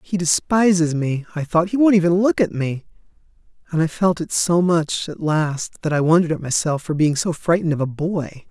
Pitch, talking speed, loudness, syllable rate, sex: 165 Hz, 220 wpm, -19 LUFS, 5.3 syllables/s, male